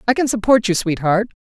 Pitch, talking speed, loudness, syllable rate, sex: 210 Hz, 210 wpm, -17 LUFS, 6.0 syllables/s, female